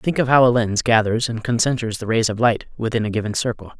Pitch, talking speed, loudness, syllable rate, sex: 115 Hz, 255 wpm, -19 LUFS, 6.1 syllables/s, male